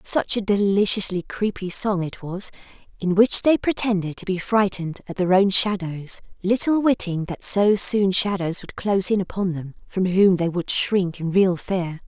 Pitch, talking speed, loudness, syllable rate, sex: 190 Hz, 185 wpm, -21 LUFS, 4.6 syllables/s, female